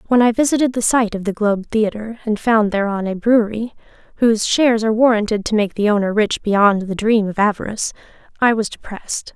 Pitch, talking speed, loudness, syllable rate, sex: 215 Hz, 200 wpm, -17 LUFS, 6.0 syllables/s, female